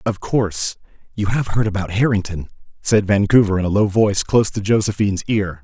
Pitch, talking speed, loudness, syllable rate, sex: 100 Hz, 180 wpm, -18 LUFS, 5.9 syllables/s, male